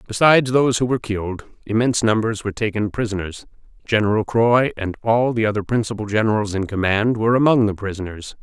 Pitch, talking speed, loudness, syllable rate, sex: 110 Hz, 170 wpm, -19 LUFS, 6.3 syllables/s, male